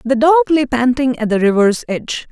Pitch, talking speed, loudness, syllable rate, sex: 255 Hz, 205 wpm, -14 LUFS, 5.5 syllables/s, female